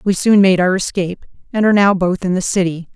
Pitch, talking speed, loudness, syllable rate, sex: 190 Hz, 245 wpm, -15 LUFS, 6.3 syllables/s, female